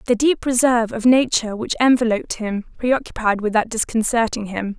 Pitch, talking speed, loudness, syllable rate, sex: 230 Hz, 150 wpm, -19 LUFS, 5.6 syllables/s, female